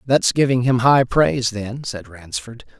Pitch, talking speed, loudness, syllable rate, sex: 120 Hz, 170 wpm, -18 LUFS, 4.3 syllables/s, male